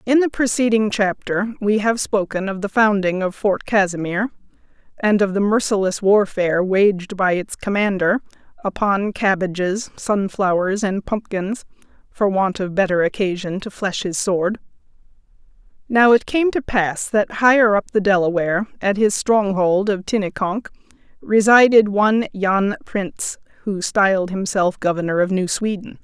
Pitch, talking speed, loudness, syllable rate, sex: 200 Hz, 145 wpm, -19 LUFS, 4.6 syllables/s, female